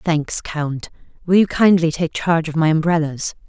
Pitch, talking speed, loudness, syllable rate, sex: 160 Hz, 170 wpm, -18 LUFS, 4.8 syllables/s, female